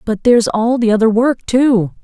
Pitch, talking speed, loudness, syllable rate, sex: 230 Hz, 205 wpm, -13 LUFS, 4.8 syllables/s, female